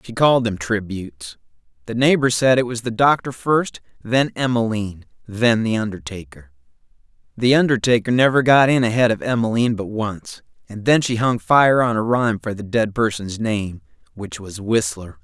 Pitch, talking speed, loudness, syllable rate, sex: 115 Hz, 170 wpm, -18 LUFS, 5.1 syllables/s, male